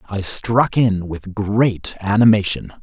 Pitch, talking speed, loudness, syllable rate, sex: 105 Hz, 125 wpm, -18 LUFS, 3.5 syllables/s, male